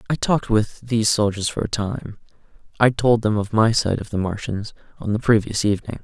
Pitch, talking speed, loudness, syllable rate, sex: 110 Hz, 210 wpm, -21 LUFS, 5.7 syllables/s, male